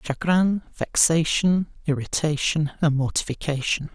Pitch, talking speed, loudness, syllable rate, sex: 155 Hz, 75 wpm, -22 LUFS, 4.3 syllables/s, male